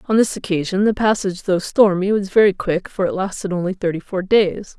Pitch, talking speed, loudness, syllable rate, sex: 190 Hz, 215 wpm, -18 LUFS, 5.5 syllables/s, female